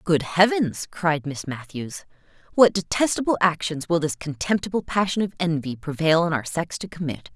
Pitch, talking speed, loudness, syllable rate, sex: 170 Hz, 165 wpm, -23 LUFS, 4.9 syllables/s, female